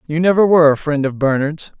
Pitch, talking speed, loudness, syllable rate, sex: 155 Hz, 235 wpm, -15 LUFS, 6.2 syllables/s, male